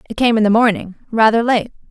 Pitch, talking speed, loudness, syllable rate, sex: 220 Hz, 220 wpm, -15 LUFS, 6.4 syllables/s, female